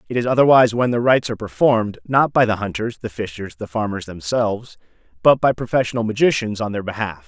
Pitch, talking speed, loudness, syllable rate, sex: 110 Hz, 200 wpm, -19 LUFS, 6.4 syllables/s, male